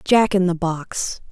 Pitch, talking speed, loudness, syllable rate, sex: 180 Hz, 180 wpm, -20 LUFS, 3.5 syllables/s, female